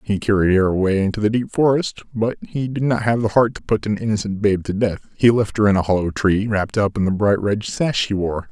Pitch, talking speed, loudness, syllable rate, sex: 105 Hz, 270 wpm, -19 LUFS, 5.7 syllables/s, male